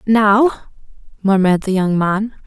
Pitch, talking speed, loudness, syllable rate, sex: 205 Hz, 120 wpm, -15 LUFS, 4.0 syllables/s, female